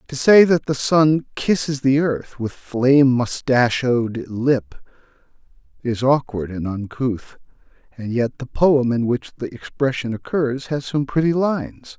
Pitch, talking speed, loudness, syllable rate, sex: 130 Hz, 145 wpm, -19 LUFS, 4.0 syllables/s, male